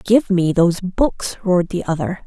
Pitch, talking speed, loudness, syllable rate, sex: 185 Hz, 185 wpm, -18 LUFS, 4.9 syllables/s, female